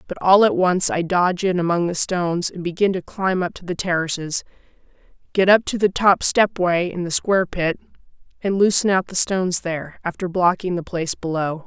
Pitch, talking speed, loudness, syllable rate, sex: 180 Hz, 205 wpm, -20 LUFS, 5.4 syllables/s, female